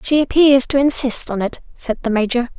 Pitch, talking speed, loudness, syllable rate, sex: 255 Hz, 210 wpm, -16 LUFS, 5.2 syllables/s, female